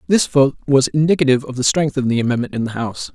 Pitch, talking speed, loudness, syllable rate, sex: 135 Hz, 250 wpm, -17 LUFS, 7.0 syllables/s, male